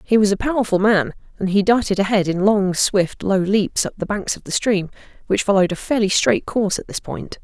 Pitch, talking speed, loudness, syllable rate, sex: 200 Hz, 235 wpm, -19 LUFS, 5.6 syllables/s, female